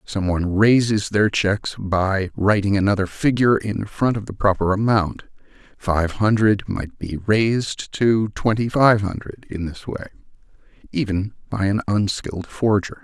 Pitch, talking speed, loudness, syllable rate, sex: 105 Hz, 145 wpm, -20 LUFS, 4.5 syllables/s, male